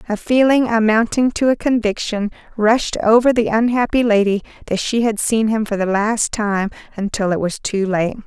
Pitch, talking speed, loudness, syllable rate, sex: 220 Hz, 180 wpm, -17 LUFS, 4.9 syllables/s, female